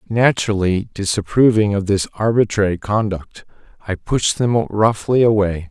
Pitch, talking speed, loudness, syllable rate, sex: 105 Hz, 115 wpm, -17 LUFS, 4.7 syllables/s, male